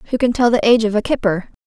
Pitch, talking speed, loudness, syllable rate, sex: 225 Hz, 290 wpm, -16 LUFS, 7.7 syllables/s, female